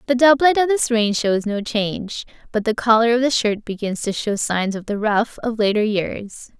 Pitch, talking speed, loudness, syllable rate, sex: 225 Hz, 220 wpm, -19 LUFS, 4.8 syllables/s, female